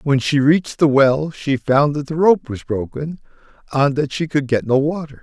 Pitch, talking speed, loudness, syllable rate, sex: 145 Hz, 220 wpm, -18 LUFS, 4.8 syllables/s, male